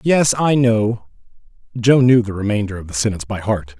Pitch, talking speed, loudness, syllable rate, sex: 110 Hz, 190 wpm, -17 LUFS, 5.3 syllables/s, male